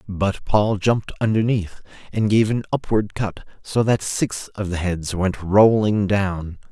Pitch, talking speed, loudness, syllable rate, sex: 100 Hz, 160 wpm, -21 LUFS, 3.9 syllables/s, male